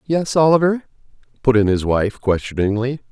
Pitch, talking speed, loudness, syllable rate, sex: 125 Hz, 135 wpm, -18 LUFS, 5.0 syllables/s, male